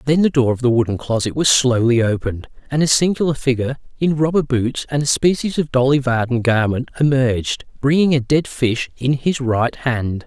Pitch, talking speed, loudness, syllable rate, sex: 130 Hz, 195 wpm, -17 LUFS, 5.3 syllables/s, male